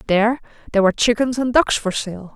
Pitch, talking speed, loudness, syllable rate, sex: 225 Hz, 205 wpm, -18 LUFS, 6.5 syllables/s, female